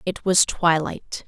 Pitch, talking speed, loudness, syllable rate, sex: 170 Hz, 140 wpm, -20 LUFS, 3.5 syllables/s, female